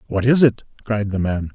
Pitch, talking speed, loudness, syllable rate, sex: 105 Hz, 235 wpm, -19 LUFS, 5.1 syllables/s, male